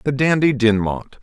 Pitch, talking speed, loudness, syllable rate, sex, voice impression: 125 Hz, 145 wpm, -17 LUFS, 4.6 syllables/s, male, very masculine, adult-like, thick, cool, intellectual, slightly refreshing